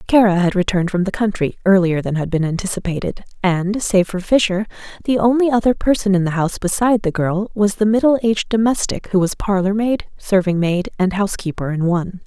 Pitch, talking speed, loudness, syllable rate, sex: 195 Hz, 195 wpm, -17 LUFS, 5.9 syllables/s, female